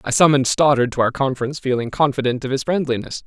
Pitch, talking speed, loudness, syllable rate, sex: 135 Hz, 200 wpm, -19 LUFS, 7.0 syllables/s, male